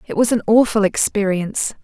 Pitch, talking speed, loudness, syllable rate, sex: 210 Hz, 165 wpm, -17 LUFS, 5.5 syllables/s, female